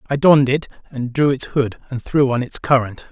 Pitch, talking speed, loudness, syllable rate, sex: 130 Hz, 230 wpm, -18 LUFS, 5.4 syllables/s, male